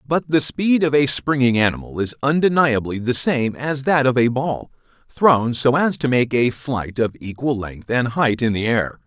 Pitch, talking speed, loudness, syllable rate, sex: 130 Hz, 205 wpm, -19 LUFS, 4.5 syllables/s, male